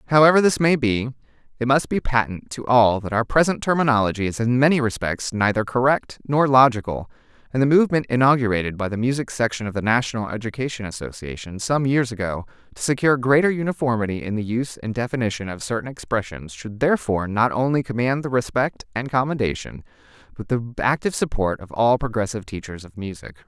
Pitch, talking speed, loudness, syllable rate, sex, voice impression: 120 Hz, 175 wpm, -21 LUFS, 6.2 syllables/s, male, masculine, adult-like, refreshing, sincere